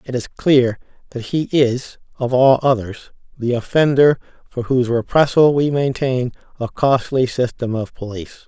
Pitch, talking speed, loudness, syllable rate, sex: 125 Hz, 150 wpm, -17 LUFS, 4.6 syllables/s, male